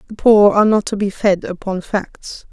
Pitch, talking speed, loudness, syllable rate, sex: 200 Hz, 215 wpm, -15 LUFS, 4.7 syllables/s, female